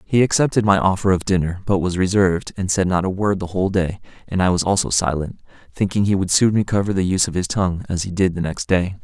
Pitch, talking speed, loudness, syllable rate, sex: 95 Hz, 250 wpm, -19 LUFS, 6.4 syllables/s, male